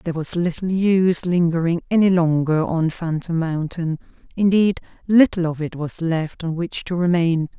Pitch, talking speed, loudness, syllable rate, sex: 170 Hz, 150 wpm, -20 LUFS, 4.8 syllables/s, female